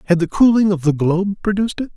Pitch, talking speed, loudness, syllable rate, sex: 190 Hz, 245 wpm, -16 LUFS, 7.1 syllables/s, male